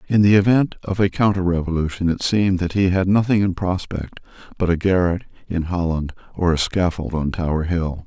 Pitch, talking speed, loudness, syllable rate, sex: 90 Hz, 185 wpm, -20 LUFS, 5.4 syllables/s, male